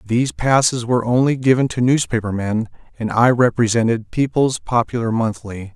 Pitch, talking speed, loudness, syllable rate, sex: 120 Hz, 145 wpm, -18 LUFS, 5.2 syllables/s, male